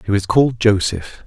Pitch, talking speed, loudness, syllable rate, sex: 105 Hz, 190 wpm, -16 LUFS, 5.2 syllables/s, male